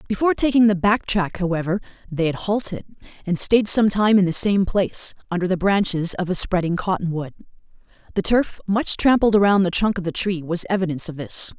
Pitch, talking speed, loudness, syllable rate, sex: 190 Hz, 190 wpm, -20 LUFS, 5.7 syllables/s, female